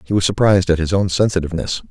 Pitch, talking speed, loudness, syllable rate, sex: 90 Hz, 220 wpm, -17 LUFS, 7.4 syllables/s, male